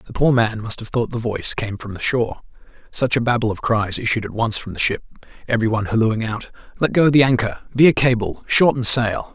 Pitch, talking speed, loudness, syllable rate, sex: 115 Hz, 220 wpm, -19 LUFS, 5.9 syllables/s, male